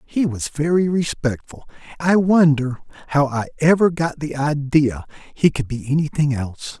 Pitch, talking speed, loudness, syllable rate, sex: 145 Hz, 150 wpm, -19 LUFS, 4.7 syllables/s, male